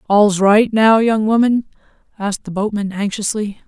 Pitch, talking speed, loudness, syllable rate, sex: 210 Hz, 145 wpm, -16 LUFS, 4.6 syllables/s, female